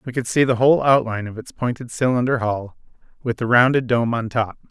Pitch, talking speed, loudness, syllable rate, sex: 120 Hz, 215 wpm, -19 LUFS, 5.9 syllables/s, male